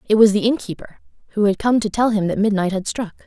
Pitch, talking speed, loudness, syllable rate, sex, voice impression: 205 Hz, 255 wpm, -18 LUFS, 6.3 syllables/s, female, very feminine, young, slightly adult-like, very thin, slightly relaxed, weak, slightly dark, hard, clear, slightly muffled, very fluent, raspy, very cute, slightly cool, intellectual, refreshing, sincere, slightly calm, very friendly, very reassuring, very unique, slightly elegant, wild, sweet, very lively, strict, intense, slightly sharp, slightly modest, light